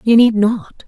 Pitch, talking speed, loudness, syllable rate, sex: 220 Hz, 205 wpm, -13 LUFS, 3.9 syllables/s, female